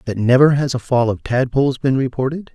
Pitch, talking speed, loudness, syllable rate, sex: 130 Hz, 210 wpm, -17 LUFS, 5.8 syllables/s, male